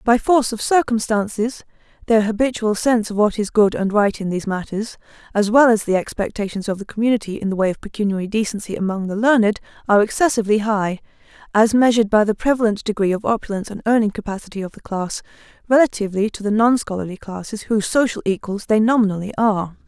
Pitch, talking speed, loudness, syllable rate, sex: 215 Hz, 185 wpm, -19 LUFS, 6.6 syllables/s, female